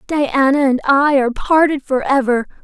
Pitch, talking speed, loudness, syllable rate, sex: 275 Hz, 135 wpm, -15 LUFS, 4.8 syllables/s, female